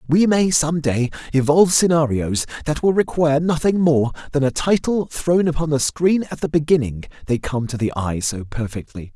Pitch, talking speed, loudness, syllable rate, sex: 145 Hz, 185 wpm, -19 LUFS, 5.1 syllables/s, male